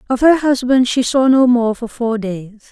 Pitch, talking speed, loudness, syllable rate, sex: 245 Hz, 220 wpm, -14 LUFS, 4.5 syllables/s, female